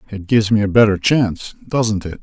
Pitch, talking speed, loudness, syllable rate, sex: 105 Hz, 190 wpm, -16 LUFS, 5.7 syllables/s, male